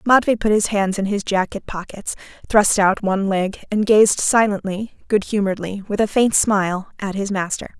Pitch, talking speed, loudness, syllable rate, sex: 200 Hz, 185 wpm, -19 LUFS, 5.0 syllables/s, female